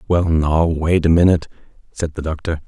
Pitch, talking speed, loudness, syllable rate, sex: 80 Hz, 155 wpm, -17 LUFS, 5.4 syllables/s, male